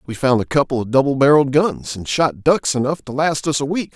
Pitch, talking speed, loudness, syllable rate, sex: 135 Hz, 260 wpm, -17 LUFS, 5.8 syllables/s, male